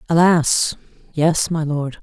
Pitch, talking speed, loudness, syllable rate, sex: 160 Hz, 120 wpm, -18 LUFS, 3.4 syllables/s, female